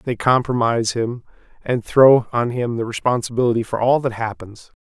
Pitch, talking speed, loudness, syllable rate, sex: 120 Hz, 160 wpm, -18 LUFS, 5.1 syllables/s, male